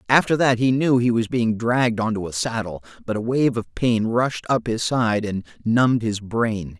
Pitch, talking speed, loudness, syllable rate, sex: 115 Hz, 210 wpm, -21 LUFS, 4.7 syllables/s, male